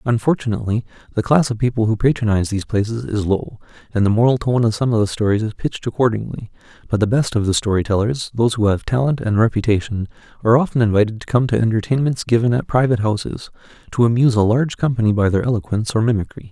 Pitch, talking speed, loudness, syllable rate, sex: 115 Hz, 200 wpm, -18 LUFS, 7.0 syllables/s, male